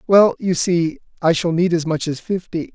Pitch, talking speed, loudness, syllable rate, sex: 170 Hz, 220 wpm, -19 LUFS, 4.7 syllables/s, male